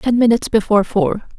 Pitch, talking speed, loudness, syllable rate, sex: 220 Hz, 175 wpm, -16 LUFS, 6.3 syllables/s, female